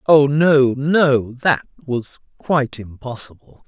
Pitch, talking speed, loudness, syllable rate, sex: 135 Hz, 115 wpm, -17 LUFS, 3.4 syllables/s, male